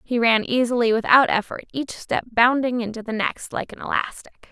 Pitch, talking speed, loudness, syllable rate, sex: 235 Hz, 185 wpm, -21 LUFS, 5.1 syllables/s, female